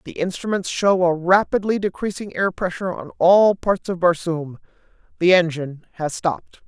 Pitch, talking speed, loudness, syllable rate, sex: 180 Hz, 145 wpm, -20 LUFS, 5.1 syllables/s, female